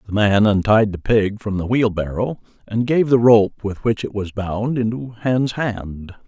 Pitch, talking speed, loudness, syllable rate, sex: 110 Hz, 190 wpm, -18 LUFS, 4.3 syllables/s, male